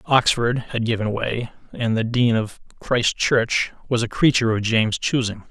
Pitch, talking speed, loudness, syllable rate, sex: 115 Hz, 175 wpm, -21 LUFS, 4.5 syllables/s, male